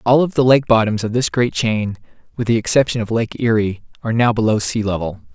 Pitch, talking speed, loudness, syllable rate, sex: 115 Hz, 215 wpm, -17 LUFS, 5.9 syllables/s, male